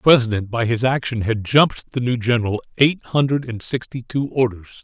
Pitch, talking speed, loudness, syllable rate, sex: 120 Hz, 200 wpm, -20 LUFS, 5.4 syllables/s, male